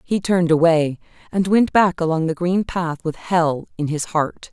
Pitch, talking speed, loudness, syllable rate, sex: 170 Hz, 200 wpm, -19 LUFS, 4.5 syllables/s, female